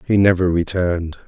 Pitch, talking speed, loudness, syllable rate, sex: 90 Hz, 140 wpm, -18 LUFS, 5.8 syllables/s, male